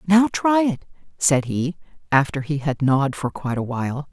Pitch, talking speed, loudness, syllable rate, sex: 155 Hz, 190 wpm, -21 LUFS, 5.1 syllables/s, female